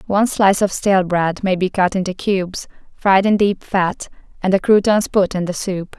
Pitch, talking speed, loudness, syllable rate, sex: 190 Hz, 210 wpm, -17 LUFS, 5.2 syllables/s, female